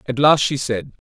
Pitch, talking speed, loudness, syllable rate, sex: 135 Hz, 225 wpm, -18 LUFS, 4.8 syllables/s, male